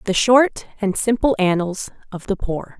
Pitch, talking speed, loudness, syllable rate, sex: 205 Hz, 170 wpm, -19 LUFS, 4.3 syllables/s, female